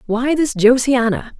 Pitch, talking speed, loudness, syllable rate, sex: 245 Hz, 130 wpm, -15 LUFS, 4.1 syllables/s, female